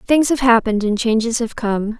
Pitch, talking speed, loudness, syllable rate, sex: 230 Hz, 210 wpm, -17 LUFS, 5.3 syllables/s, female